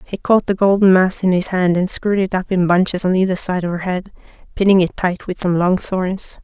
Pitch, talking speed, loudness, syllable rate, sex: 185 Hz, 250 wpm, -17 LUFS, 5.5 syllables/s, female